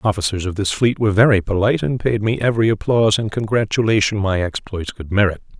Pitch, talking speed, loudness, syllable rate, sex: 105 Hz, 205 wpm, -18 LUFS, 6.5 syllables/s, male